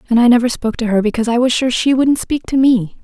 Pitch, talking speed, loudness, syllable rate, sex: 240 Hz, 295 wpm, -14 LUFS, 6.8 syllables/s, female